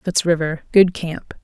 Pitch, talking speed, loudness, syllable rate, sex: 170 Hz, 125 wpm, -18 LUFS, 4.2 syllables/s, female